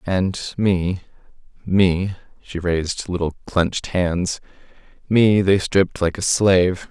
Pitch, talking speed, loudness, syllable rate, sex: 90 Hz, 95 wpm, -19 LUFS, 3.8 syllables/s, male